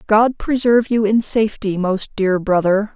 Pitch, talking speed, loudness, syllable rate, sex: 210 Hz, 160 wpm, -17 LUFS, 4.7 syllables/s, female